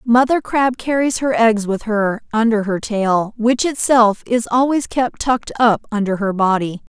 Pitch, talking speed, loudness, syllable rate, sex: 225 Hz, 170 wpm, -17 LUFS, 4.4 syllables/s, female